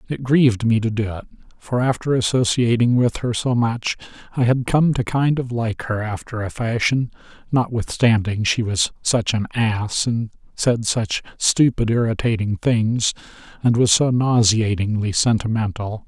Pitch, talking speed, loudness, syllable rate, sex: 115 Hz, 155 wpm, -20 LUFS, 4.4 syllables/s, male